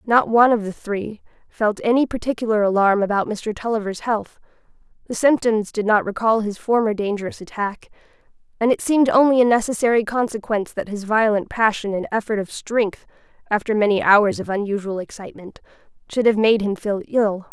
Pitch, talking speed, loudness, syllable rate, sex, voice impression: 215 Hz, 170 wpm, -20 LUFS, 5.6 syllables/s, female, feminine, adult-like, slightly fluent, slightly intellectual, slightly calm